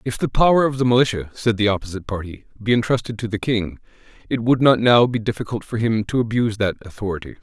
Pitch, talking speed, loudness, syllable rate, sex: 110 Hz, 220 wpm, -20 LUFS, 6.6 syllables/s, male